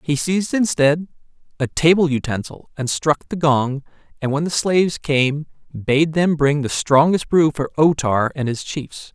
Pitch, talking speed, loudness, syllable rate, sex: 150 Hz, 175 wpm, -18 LUFS, 4.4 syllables/s, male